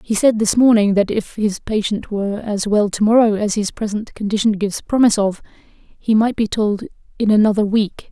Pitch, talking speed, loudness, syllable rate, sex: 210 Hz, 200 wpm, -17 LUFS, 5.2 syllables/s, female